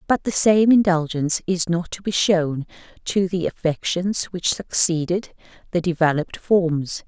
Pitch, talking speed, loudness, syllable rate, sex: 175 Hz, 145 wpm, -20 LUFS, 4.6 syllables/s, female